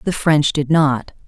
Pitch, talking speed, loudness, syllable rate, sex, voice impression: 150 Hz, 190 wpm, -16 LUFS, 3.8 syllables/s, female, feminine, adult-like, tensed, powerful, clear, fluent, intellectual, calm, friendly, reassuring, elegant, kind, modest